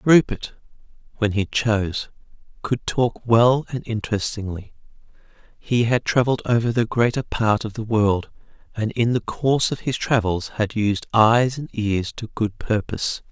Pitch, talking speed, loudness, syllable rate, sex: 115 Hz, 155 wpm, -21 LUFS, 4.5 syllables/s, male